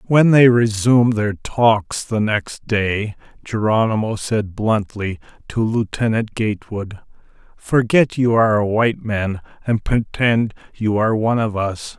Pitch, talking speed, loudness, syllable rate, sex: 110 Hz, 135 wpm, -18 LUFS, 4.2 syllables/s, male